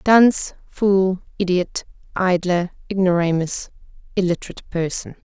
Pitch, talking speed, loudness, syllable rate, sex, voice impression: 180 Hz, 80 wpm, -20 LUFS, 4.6 syllables/s, female, feminine, adult-like, slightly relaxed, powerful, slightly soft, slightly raspy, intellectual, calm, friendly, reassuring, kind, slightly modest